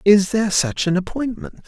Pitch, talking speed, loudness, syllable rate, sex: 190 Hz, 180 wpm, -19 LUFS, 5.1 syllables/s, male